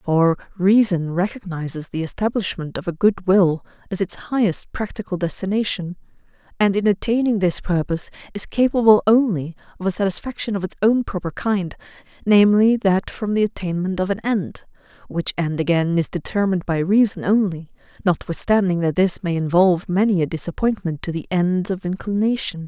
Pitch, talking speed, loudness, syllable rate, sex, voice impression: 190 Hz, 155 wpm, -20 LUFS, 5.4 syllables/s, female, very feminine, very adult-like, very middle-aged, thin, relaxed, weak, slightly dark, very soft, slightly muffled, fluent, slightly cute, cool, very intellectual, slightly refreshing, very sincere, very calm, friendly, reassuring, unique, very elegant, sweet, slightly lively, kind, intense, slightly sharp, very modest, light